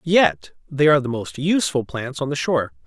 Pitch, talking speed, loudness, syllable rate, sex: 140 Hz, 210 wpm, -20 LUFS, 5.6 syllables/s, male